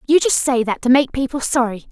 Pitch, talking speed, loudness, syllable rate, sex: 260 Hz, 250 wpm, -17 LUFS, 5.9 syllables/s, female